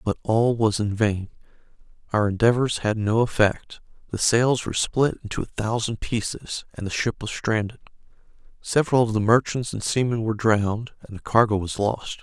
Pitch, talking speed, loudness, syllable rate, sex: 110 Hz, 175 wpm, -23 LUFS, 5.2 syllables/s, male